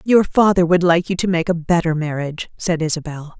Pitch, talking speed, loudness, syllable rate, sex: 170 Hz, 230 wpm, -18 LUFS, 5.9 syllables/s, female